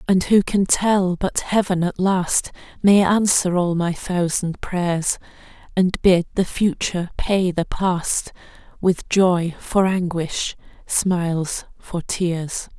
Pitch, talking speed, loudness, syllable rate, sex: 180 Hz, 130 wpm, -20 LUFS, 3.3 syllables/s, female